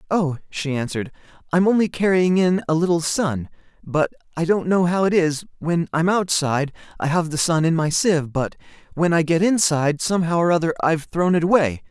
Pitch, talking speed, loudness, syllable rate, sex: 165 Hz, 195 wpm, -20 LUFS, 5.7 syllables/s, male